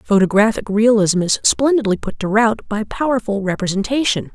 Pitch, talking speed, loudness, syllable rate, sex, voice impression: 215 Hz, 140 wpm, -17 LUFS, 5.2 syllables/s, female, feminine, adult-like, tensed, powerful, slightly bright, clear, fluent, intellectual, calm, elegant, lively, slightly sharp